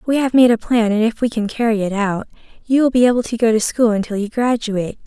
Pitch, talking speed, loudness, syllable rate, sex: 225 Hz, 270 wpm, -17 LUFS, 6.2 syllables/s, female